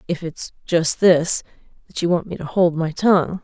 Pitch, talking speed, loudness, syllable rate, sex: 170 Hz, 190 wpm, -19 LUFS, 4.8 syllables/s, female